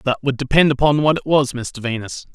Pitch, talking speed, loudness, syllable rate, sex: 135 Hz, 230 wpm, -18 LUFS, 5.5 syllables/s, male